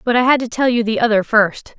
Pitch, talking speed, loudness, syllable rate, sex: 230 Hz, 305 wpm, -15 LUFS, 5.9 syllables/s, female